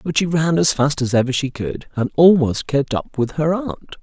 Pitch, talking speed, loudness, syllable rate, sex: 145 Hz, 240 wpm, -18 LUFS, 4.7 syllables/s, male